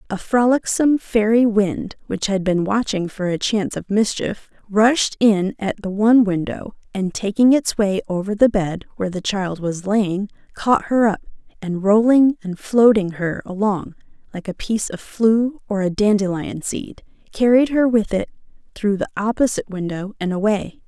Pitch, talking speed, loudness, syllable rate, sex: 205 Hz, 170 wpm, -19 LUFS, 4.7 syllables/s, female